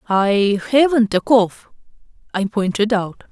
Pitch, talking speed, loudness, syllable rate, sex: 215 Hz, 125 wpm, -17 LUFS, 3.9 syllables/s, female